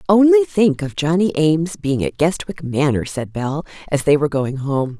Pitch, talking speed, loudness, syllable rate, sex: 160 Hz, 190 wpm, -18 LUFS, 4.9 syllables/s, female